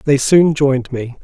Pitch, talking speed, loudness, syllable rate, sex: 140 Hz, 195 wpm, -13 LUFS, 4.7 syllables/s, male